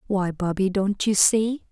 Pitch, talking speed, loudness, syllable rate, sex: 200 Hz, 175 wpm, -22 LUFS, 4.0 syllables/s, female